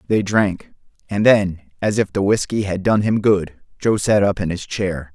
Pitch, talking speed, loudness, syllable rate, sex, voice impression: 100 Hz, 210 wpm, -19 LUFS, 4.4 syllables/s, male, masculine, adult-like, slightly old, thick, tensed, powerful, bright, slightly soft, clear, fluent, slightly raspy, very cool, intellectual, very refreshing, very sincere, calm, slightly mature, very friendly, very reassuring, very unique, very elegant, wild, very sweet, very lively, kind, slightly modest, slightly light